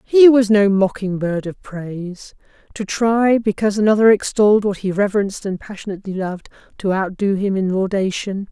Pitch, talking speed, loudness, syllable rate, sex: 200 Hz, 160 wpm, -17 LUFS, 5.4 syllables/s, female